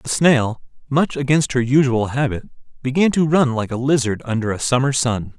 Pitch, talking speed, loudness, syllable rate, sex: 130 Hz, 190 wpm, -18 LUFS, 5.1 syllables/s, male